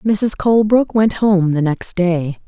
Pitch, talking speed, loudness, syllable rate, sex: 195 Hz, 170 wpm, -15 LUFS, 3.9 syllables/s, female